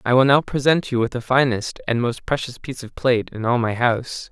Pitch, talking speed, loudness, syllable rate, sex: 125 Hz, 250 wpm, -20 LUFS, 5.7 syllables/s, male